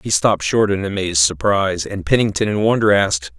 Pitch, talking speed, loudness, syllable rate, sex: 100 Hz, 195 wpm, -17 LUFS, 6.0 syllables/s, male